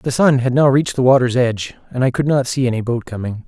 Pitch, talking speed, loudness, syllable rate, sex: 125 Hz, 275 wpm, -16 LUFS, 6.4 syllables/s, male